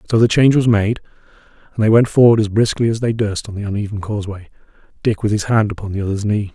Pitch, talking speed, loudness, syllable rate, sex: 105 Hz, 240 wpm, -16 LUFS, 6.9 syllables/s, male